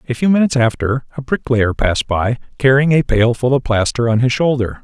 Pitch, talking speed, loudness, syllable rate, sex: 125 Hz, 210 wpm, -15 LUFS, 5.8 syllables/s, male